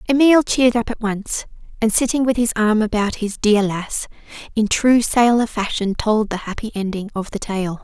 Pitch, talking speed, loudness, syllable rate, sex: 220 Hz, 190 wpm, -18 LUFS, 4.9 syllables/s, female